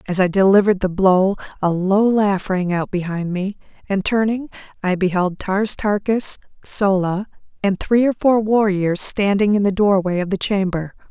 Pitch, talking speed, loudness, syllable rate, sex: 195 Hz, 165 wpm, -18 LUFS, 4.6 syllables/s, female